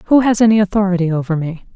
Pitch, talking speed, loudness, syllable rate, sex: 195 Hz, 205 wpm, -15 LUFS, 6.7 syllables/s, female